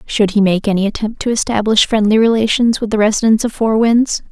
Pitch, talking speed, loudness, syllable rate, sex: 220 Hz, 210 wpm, -14 LUFS, 5.8 syllables/s, female